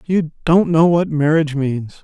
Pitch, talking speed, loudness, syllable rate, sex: 160 Hz, 175 wpm, -16 LUFS, 4.2 syllables/s, male